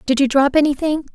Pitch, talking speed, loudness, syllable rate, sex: 280 Hz, 210 wpm, -16 LUFS, 6.1 syllables/s, female